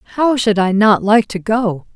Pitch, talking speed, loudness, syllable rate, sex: 215 Hz, 215 wpm, -14 LUFS, 4.5 syllables/s, female